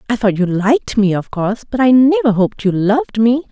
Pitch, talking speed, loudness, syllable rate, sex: 225 Hz, 240 wpm, -14 LUFS, 5.9 syllables/s, female